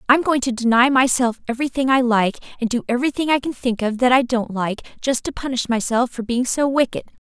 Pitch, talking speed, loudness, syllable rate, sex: 250 Hz, 225 wpm, -19 LUFS, 6.0 syllables/s, female